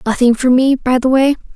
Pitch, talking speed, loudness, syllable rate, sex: 255 Hz, 230 wpm, -13 LUFS, 5.6 syllables/s, female